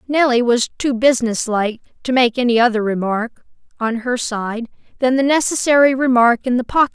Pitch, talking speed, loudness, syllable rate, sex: 245 Hz, 180 wpm, -16 LUFS, 5.4 syllables/s, female